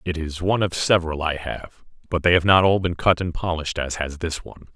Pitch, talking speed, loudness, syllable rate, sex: 85 Hz, 255 wpm, -21 LUFS, 6.1 syllables/s, male